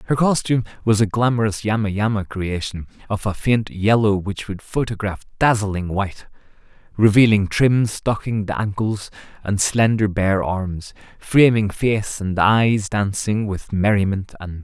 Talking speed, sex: 140 wpm, male